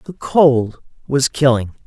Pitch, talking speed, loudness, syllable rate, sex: 140 Hz, 130 wpm, -16 LUFS, 3.7 syllables/s, female